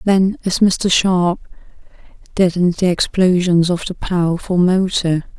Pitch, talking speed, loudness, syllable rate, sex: 180 Hz, 125 wpm, -16 LUFS, 4.4 syllables/s, female